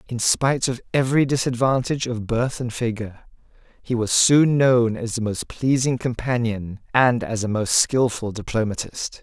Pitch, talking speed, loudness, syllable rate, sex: 120 Hz, 155 wpm, -21 LUFS, 4.9 syllables/s, male